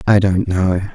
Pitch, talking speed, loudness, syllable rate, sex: 95 Hz, 190 wpm, -16 LUFS, 4.3 syllables/s, male